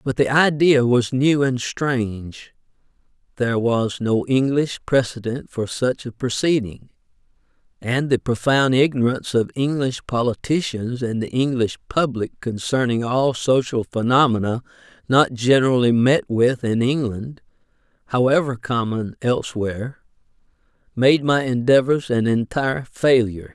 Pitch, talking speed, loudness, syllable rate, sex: 125 Hz, 115 wpm, -20 LUFS, 4.2 syllables/s, male